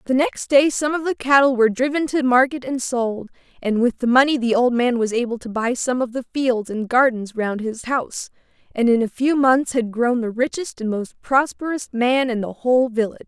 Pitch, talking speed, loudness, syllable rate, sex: 250 Hz, 225 wpm, -20 LUFS, 5.2 syllables/s, female